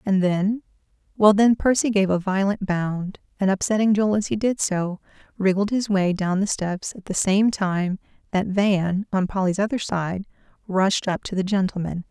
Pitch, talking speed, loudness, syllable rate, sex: 195 Hz, 175 wpm, -22 LUFS, 4.6 syllables/s, female